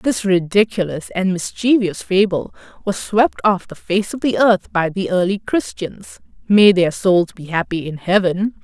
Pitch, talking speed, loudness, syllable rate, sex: 190 Hz, 160 wpm, -17 LUFS, 4.3 syllables/s, female